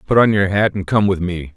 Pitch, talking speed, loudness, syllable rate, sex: 95 Hz, 310 wpm, -16 LUFS, 5.8 syllables/s, male